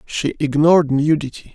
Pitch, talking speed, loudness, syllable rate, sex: 150 Hz, 115 wpm, -17 LUFS, 5.1 syllables/s, male